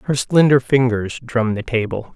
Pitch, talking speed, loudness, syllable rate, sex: 120 Hz, 165 wpm, -17 LUFS, 5.1 syllables/s, male